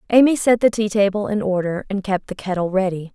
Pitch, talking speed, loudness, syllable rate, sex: 200 Hz, 230 wpm, -19 LUFS, 5.8 syllables/s, female